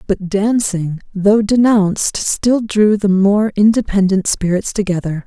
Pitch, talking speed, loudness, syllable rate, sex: 200 Hz, 125 wpm, -15 LUFS, 4.0 syllables/s, female